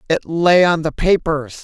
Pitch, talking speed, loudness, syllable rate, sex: 165 Hz, 185 wpm, -16 LUFS, 4.2 syllables/s, female